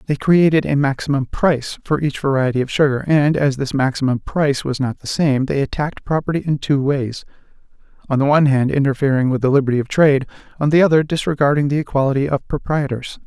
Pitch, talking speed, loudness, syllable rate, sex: 140 Hz, 190 wpm, -17 LUFS, 6.2 syllables/s, male